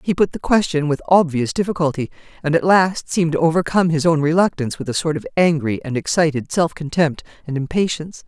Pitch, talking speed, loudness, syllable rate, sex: 160 Hz, 195 wpm, -18 LUFS, 6.1 syllables/s, female